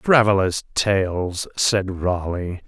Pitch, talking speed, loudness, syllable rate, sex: 95 Hz, 90 wpm, -21 LUFS, 2.9 syllables/s, male